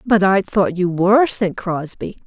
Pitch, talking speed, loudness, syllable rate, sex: 195 Hz, 185 wpm, -17 LUFS, 4.3 syllables/s, female